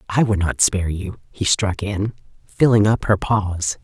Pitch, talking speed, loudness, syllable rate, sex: 100 Hz, 190 wpm, -19 LUFS, 4.7 syllables/s, female